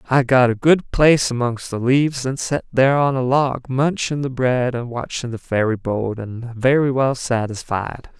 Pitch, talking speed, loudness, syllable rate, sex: 125 Hz, 190 wpm, -19 LUFS, 4.6 syllables/s, male